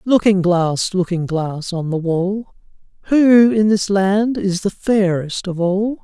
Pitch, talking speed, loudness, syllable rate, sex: 195 Hz, 160 wpm, -17 LUFS, 3.6 syllables/s, male